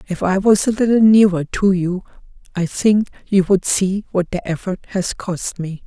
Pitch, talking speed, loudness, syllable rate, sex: 190 Hz, 195 wpm, -17 LUFS, 4.5 syllables/s, female